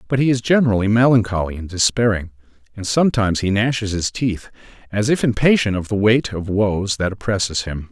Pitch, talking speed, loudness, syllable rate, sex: 105 Hz, 180 wpm, -18 LUFS, 5.8 syllables/s, male